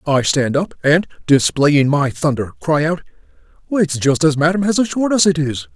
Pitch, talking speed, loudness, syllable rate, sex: 155 Hz, 190 wpm, -16 LUFS, 5.3 syllables/s, male